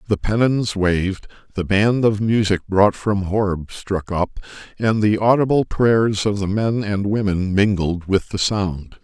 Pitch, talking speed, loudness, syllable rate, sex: 100 Hz, 165 wpm, -19 LUFS, 4.0 syllables/s, male